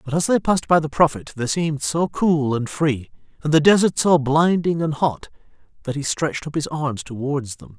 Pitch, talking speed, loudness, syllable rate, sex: 150 Hz, 215 wpm, -20 LUFS, 5.2 syllables/s, male